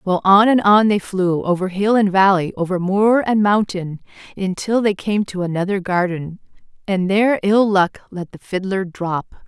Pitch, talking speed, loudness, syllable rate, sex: 195 Hz, 175 wpm, -17 LUFS, 4.7 syllables/s, female